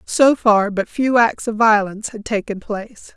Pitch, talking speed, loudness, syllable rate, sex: 215 Hz, 190 wpm, -17 LUFS, 4.6 syllables/s, female